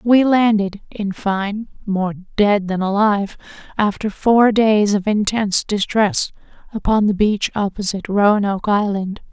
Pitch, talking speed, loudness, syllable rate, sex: 205 Hz, 130 wpm, -17 LUFS, 4.2 syllables/s, female